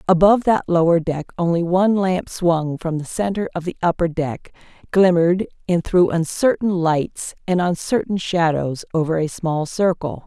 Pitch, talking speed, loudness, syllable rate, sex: 175 Hz, 160 wpm, -19 LUFS, 4.8 syllables/s, female